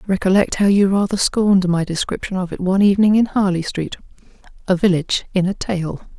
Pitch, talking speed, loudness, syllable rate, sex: 190 Hz, 185 wpm, -18 LUFS, 6.0 syllables/s, female